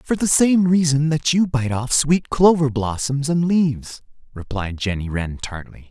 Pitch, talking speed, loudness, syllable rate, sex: 140 Hz, 175 wpm, -19 LUFS, 4.4 syllables/s, male